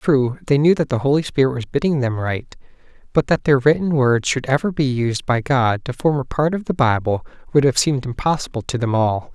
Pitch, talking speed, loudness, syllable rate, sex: 135 Hz, 230 wpm, -19 LUFS, 5.6 syllables/s, male